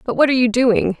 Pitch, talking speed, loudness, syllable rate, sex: 240 Hz, 300 wpm, -16 LUFS, 6.7 syllables/s, female